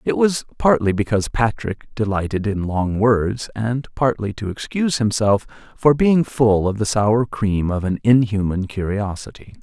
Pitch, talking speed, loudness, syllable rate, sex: 110 Hz, 155 wpm, -19 LUFS, 4.5 syllables/s, male